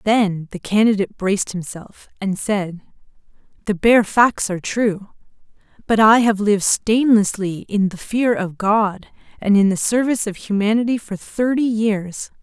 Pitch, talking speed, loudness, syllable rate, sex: 210 Hz, 150 wpm, -18 LUFS, 4.5 syllables/s, female